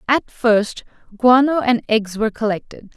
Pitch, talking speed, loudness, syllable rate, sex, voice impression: 230 Hz, 140 wpm, -17 LUFS, 4.5 syllables/s, female, very feminine, young, very thin, tensed, powerful, bright, slightly hard, very clear, fluent, cute, very intellectual, refreshing, sincere, very calm, very friendly, reassuring, unique, very elegant, slightly wild, sweet, lively, strict, slightly intense, sharp, slightly modest, light